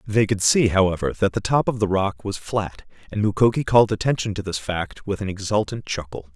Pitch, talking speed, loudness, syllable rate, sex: 100 Hz, 215 wpm, -22 LUFS, 5.6 syllables/s, male